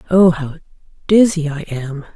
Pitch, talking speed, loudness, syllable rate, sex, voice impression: 160 Hz, 140 wpm, -16 LUFS, 4.6 syllables/s, female, very feminine, adult-like, slightly middle-aged, slightly thin, slightly relaxed, slightly weak, slightly dark, soft, clear, fluent, slightly cute, intellectual, slightly refreshing, sincere, slightly calm, elegant, slightly sweet, lively, kind, slightly modest